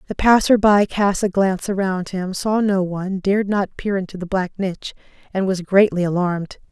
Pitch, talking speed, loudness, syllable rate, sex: 190 Hz, 195 wpm, -19 LUFS, 5.4 syllables/s, female